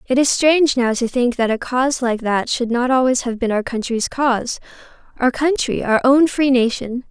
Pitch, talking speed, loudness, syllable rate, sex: 250 Hz, 195 wpm, -17 LUFS, 5.1 syllables/s, female